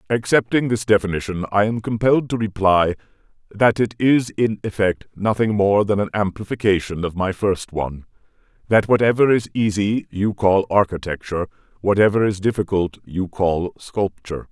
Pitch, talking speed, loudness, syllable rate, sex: 105 Hz, 140 wpm, -19 LUFS, 5.1 syllables/s, male